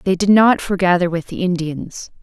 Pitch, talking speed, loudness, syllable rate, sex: 185 Hz, 190 wpm, -16 LUFS, 4.8 syllables/s, female